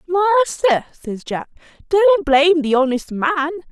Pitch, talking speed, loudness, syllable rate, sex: 315 Hz, 130 wpm, -17 LUFS, 7.8 syllables/s, female